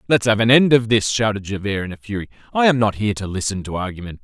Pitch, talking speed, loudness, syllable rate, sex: 110 Hz, 270 wpm, -19 LUFS, 6.8 syllables/s, male